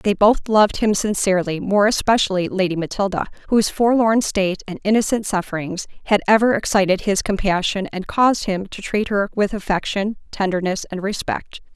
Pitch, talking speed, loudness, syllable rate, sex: 200 Hz, 160 wpm, -19 LUFS, 5.5 syllables/s, female